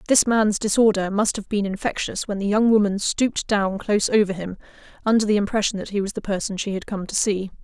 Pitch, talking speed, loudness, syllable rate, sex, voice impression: 205 Hz, 230 wpm, -21 LUFS, 6.0 syllables/s, female, very feminine, adult-like, slightly middle-aged, very thin, slightly tensed, slightly powerful, bright, very hard, very clear, very fluent, cool, very intellectual, refreshing, very sincere, very calm, unique, elegant, slightly sweet, slightly lively, very strict, very sharp